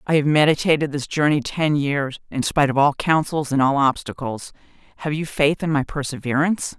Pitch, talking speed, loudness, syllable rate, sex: 145 Hz, 175 wpm, -20 LUFS, 5.5 syllables/s, female